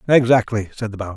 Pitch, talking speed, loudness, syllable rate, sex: 110 Hz, 205 wpm, -18 LUFS, 7.1 syllables/s, male